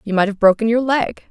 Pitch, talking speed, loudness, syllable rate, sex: 225 Hz, 275 wpm, -16 LUFS, 5.8 syllables/s, female